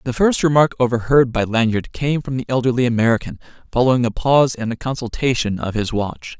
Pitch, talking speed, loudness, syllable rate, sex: 120 Hz, 190 wpm, -18 LUFS, 6.0 syllables/s, male